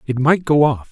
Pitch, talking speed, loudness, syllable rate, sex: 140 Hz, 260 wpm, -16 LUFS, 5.2 syllables/s, male